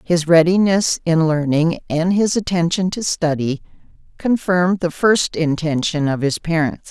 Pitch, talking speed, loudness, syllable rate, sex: 170 Hz, 140 wpm, -17 LUFS, 4.4 syllables/s, female